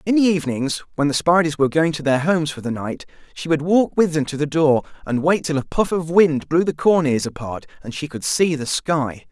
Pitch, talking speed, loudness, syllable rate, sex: 150 Hz, 260 wpm, -19 LUFS, 5.5 syllables/s, male